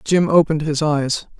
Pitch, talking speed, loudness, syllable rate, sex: 155 Hz, 170 wpm, -17 LUFS, 5.0 syllables/s, female